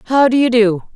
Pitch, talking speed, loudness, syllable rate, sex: 235 Hz, 250 wpm, -13 LUFS, 5.6 syllables/s, female